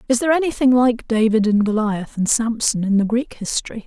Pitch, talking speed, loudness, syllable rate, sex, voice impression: 230 Hz, 200 wpm, -18 LUFS, 5.7 syllables/s, female, feminine, adult-like, slightly relaxed, powerful, soft, raspy, intellectual, calm, elegant, lively, sharp